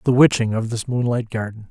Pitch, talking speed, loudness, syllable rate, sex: 115 Hz, 210 wpm, -20 LUFS, 5.7 syllables/s, male